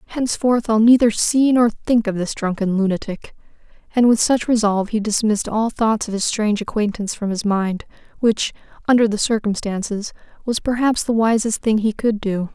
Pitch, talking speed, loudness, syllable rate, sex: 220 Hz, 175 wpm, -19 LUFS, 5.3 syllables/s, female